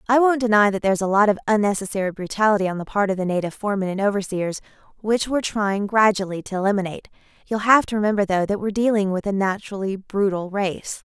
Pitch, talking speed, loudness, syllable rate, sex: 200 Hz, 205 wpm, -21 LUFS, 6.8 syllables/s, female